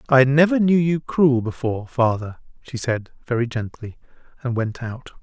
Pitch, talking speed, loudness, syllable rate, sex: 130 Hz, 160 wpm, -21 LUFS, 4.8 syllables/s, male